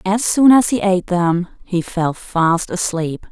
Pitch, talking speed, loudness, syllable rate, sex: 185 Hz, 180 wpm, -16 LUFS, 3.9 syllables/s, female